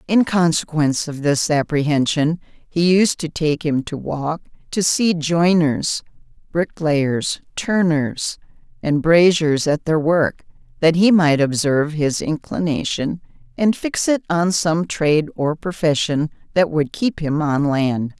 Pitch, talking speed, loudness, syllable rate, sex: 160 Hz, 140 wpm, -19 LUFS, 3.9 syllables/s, female